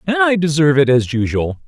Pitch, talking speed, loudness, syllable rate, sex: 155 Hz, 215 wpm, -15 LUFS, 6.0 syllables/s, male